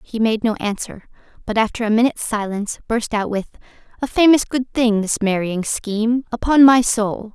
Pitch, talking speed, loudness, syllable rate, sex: 225 Hz, 180 wpm, -18 LUFS, 5.2 syllables/s, female